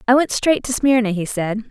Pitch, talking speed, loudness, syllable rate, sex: 235 Hz, 245 wpm, -18 LUFS, 5.4 syllables/s, female